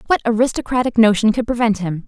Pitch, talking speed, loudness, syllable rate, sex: 225 Hz, 175 wpm, -17 LUFS, 6.5 syllables/s, female